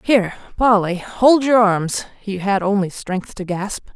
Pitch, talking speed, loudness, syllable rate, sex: 200 Hz, 165 wpm, -18 LUFS, 4.1 syllables/s, female